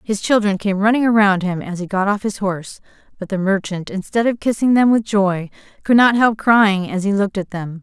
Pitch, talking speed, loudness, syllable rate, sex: 200 Hz, 230 wpm, -17 LUFS, 5.3 syllables/s, female